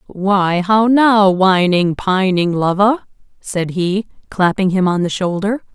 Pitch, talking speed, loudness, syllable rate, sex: 190 Hz, 135 wpm, -15 LUFS, 3.7 syllables/s, female